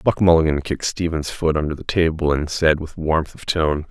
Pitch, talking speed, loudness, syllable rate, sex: 80 Hz, 215 wpm, -20 LUFS, 5.2 syllables/s, male